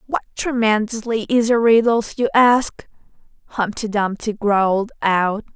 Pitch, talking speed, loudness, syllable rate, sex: 220 Hz, 110 wpm, -18 LUFS, 4.1 syllables/s, female